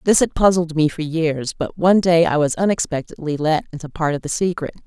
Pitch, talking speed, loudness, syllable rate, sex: 160 Hz, 220 wpm, -19 LUFS, 5.8 syllables/s, female